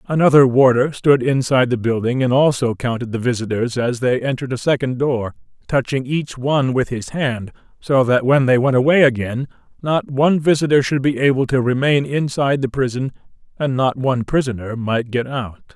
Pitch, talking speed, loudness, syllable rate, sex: 130 Hz, 185 wpm, -17 LUFS, 5.4 syllables/s, male